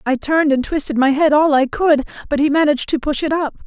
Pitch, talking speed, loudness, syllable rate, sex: 290 Hz, 260 wpm, -16 LUFS, 6.1 syllables/s, female